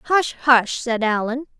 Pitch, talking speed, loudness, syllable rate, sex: 250 Hz, 150 wpm, -19 LUFS, 3.8 syllables/s, female